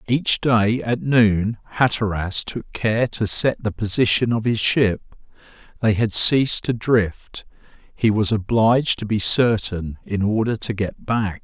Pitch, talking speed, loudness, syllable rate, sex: 110 Hz, 155 wpm, -19 LUFS, 3.9 syllables/s, male